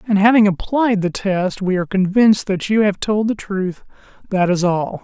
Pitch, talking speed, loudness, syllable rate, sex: 200 Hz, 190 wpm, -17 LUFS, 5.0 syllables/s, male